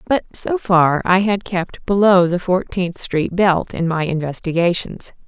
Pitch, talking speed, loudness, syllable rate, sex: 180 Hz, 160 wpm, -17 LUFS, 4.1 syllables/s, female